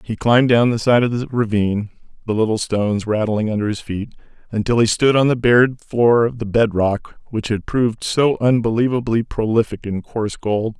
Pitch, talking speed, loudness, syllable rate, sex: 115 Hz, 195 wpm, -18 LUFS, 5.3 syllables/s, male